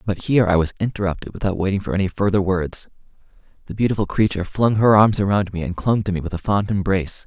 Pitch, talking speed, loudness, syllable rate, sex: 95 Hz, 225 wpm, -20 LUFS, 6.7 syllables/s, male